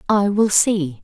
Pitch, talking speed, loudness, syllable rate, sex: 190 Hz, 175 wpm, -17 LUFS, 3.5 syllables/s, female